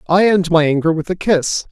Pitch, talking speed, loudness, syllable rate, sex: 170 Hz, 245 wpm, -15 LUFS, 5.1 syllables/s, male